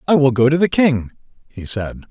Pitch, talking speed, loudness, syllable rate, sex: 140 Hz, 230 wpm, -16 LUFS, 5.3 syllables/s, male